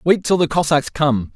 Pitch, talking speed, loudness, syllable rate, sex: 145 Hz, 220 wpm, -17 LUFS, 4.8 syllables/s, male